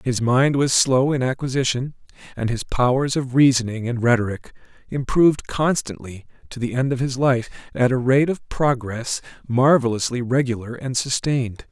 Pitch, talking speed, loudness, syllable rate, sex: 125 Hz, 155 wpm, -20 LUFS, 5.0 syllables/s, male